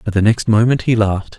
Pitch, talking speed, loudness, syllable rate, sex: 110 Hz, 260 wpm, -15 LUFS, 6.2 syllables/s, male